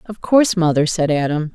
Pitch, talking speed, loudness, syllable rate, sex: 170 Hz, 195 wpm, -16 LUFS, 5.5 syllables/s, female